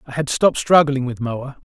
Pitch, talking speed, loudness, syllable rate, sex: 135 Hz, 210 wpm, -18 LUFS, 5.3 syllables/s, male